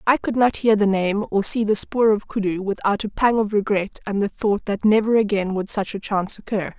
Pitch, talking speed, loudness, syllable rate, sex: 205 Hz, 250 wpm, -21 LUFS, 5.3 syllables/s, female